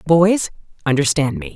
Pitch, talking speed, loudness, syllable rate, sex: 145 Hz, 115 wpm, -17 LUFS, 4.8 syllables/s, female